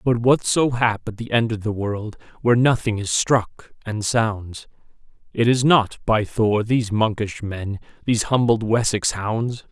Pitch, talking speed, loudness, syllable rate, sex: 110 Hz, 165 wpm, -20 LUFS, 4.2 syllables/s, male